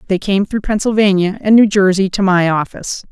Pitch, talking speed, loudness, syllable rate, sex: 195 Hz, 190 wpm, -14 LUFS, 5.6 syllables/s, female